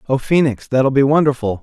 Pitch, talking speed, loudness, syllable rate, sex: 135 Hz, 185 wpm, -15 LUFS, 5.5 syllables/s, male